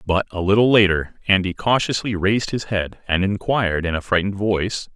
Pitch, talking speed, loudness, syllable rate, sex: 100 Hz, 180 wpm, -20 LUFS, 5.6 syllables/s, male